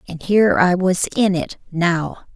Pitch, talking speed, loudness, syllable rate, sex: 180 Hz, 180 wpm, -18 LUFS, 4.5 syllables/s, female